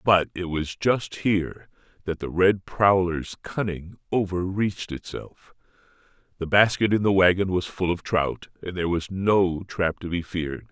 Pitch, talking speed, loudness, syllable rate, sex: 90 Hz, 160 wpm, -24 LUFS, 4.5 syllables/s, male